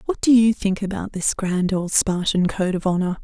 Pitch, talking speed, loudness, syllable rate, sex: 195 Hz, 225 wpm, -20 LUFS, 4.9 syllables/s, female